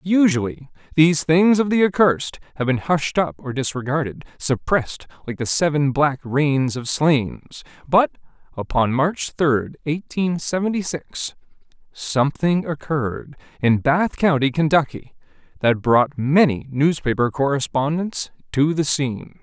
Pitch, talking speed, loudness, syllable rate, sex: 145 Hz, 120 wpm, -20 LUFS, 4.3 syllables/s, male